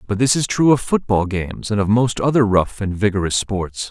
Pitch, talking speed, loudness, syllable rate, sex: 110 Hz, 230 wpm, -18 LUFS, 5.3 syllables/s, male